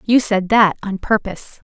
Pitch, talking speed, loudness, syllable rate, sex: 205 Hz, 175 wpm, -16 LUFS, 4.7 syllables/s, female